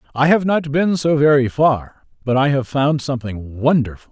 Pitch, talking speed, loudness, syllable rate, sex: 135 Hz, 190 wpm, -17 LUFS, 5.0 syllables/s, male